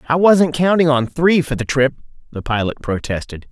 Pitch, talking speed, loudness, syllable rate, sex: 145 Hz, 190 wpm, -16 LUFS, 5.2 syllables/s, male